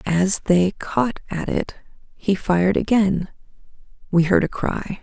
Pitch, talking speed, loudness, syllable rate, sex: 190 Hz, 130 wpm, -20 LUFS, 4.0 syllables/s, female